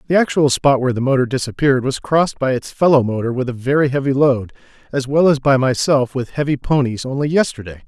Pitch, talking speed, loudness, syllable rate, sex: 135 Hz, 215 wpm, -17 LUFS, 6.3 syllables/s, male